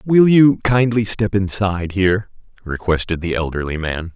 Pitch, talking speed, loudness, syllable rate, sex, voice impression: 100 Hz, 145 wpm, -17 LUFS, 4.9 syllables/s, male, very masculine, very adult-like, slightly middle-aged, very thick, slightly tensed, slightly powerful, bright, soft, clear, fluent, cool, very intellectual, slightly refreshing, very sincere, very calm, mature, very friendly, reassuring, very unique, elegant, slightly sweet, lively, kind